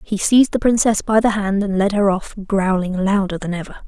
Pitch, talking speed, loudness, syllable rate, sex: 200 Hz, 230 wpm, -18 LUFS, 5.6 syllables/s, female